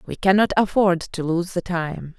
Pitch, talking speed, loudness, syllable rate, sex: 180 Hz, 190 wpm, -21 LUFS, 4.5 syllables/s, female